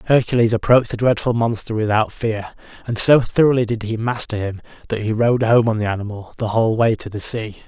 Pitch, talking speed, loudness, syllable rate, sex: 115 Hz, 210 wpm, -18 LUFS, 5.9 syllables/s, male